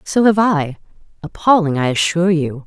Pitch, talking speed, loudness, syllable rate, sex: 170 Hz, 160 wpm, -16 LUFS, 5.1 syllables/s, female